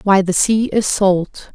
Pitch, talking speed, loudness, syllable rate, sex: 195 Hz, 195 wpm, -15 LUFS, 3.5 syllables/s, female